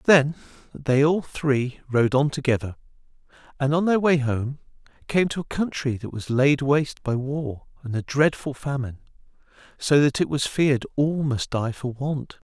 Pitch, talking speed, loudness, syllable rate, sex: 135 Hz, 175 wpm, -23 LUFS, 4.7 syllables/s, male